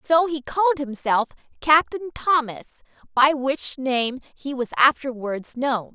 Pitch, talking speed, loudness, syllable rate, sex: 275 Hz, 130 wpm, -22 LUFS, 3.9 syllables/s, female